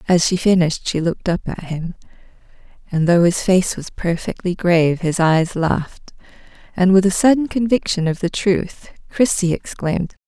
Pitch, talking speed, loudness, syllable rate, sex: 180 Hz, 165 wpm, -18 LUFS, 5.0 syllables/s, female